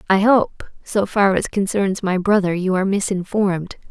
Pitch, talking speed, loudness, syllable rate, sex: 195 Hz, 170 wpm, -19 LUFS, 4.8 syllables/s, female